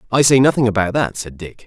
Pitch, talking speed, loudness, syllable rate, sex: 115 Hz, 255 wpm, -15 LUFS, 6.3 syllables/s, male